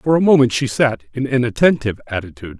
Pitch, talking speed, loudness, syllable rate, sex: 125 Hz, 210 wpm, -17 LUFS, 6.8 syllables/s, male